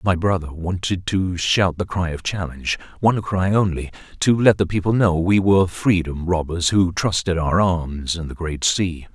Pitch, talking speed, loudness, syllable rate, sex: 90 Hz, 175 wpm, -20 LUFS, 4.7 syllables/s, male